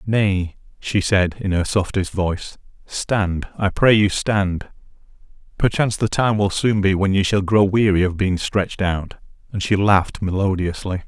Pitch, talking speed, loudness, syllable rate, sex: 95 Hz, 170 wpm, -19 LUFS, 4.5 syllables/s, male